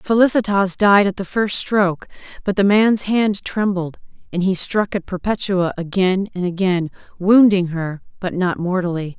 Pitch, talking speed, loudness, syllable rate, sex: 190 Hz, 155 wpm, -18 LUFS, 4.6 syllables/s, female